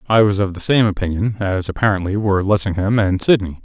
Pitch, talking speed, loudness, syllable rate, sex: 100 Hz, 200 wpm, -17 LUFS, 6.1 syllables/s, male